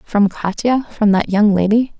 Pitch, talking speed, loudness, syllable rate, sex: 210 Hz, 180 wpm, -16 LUFS, 4.7 syllables/s, female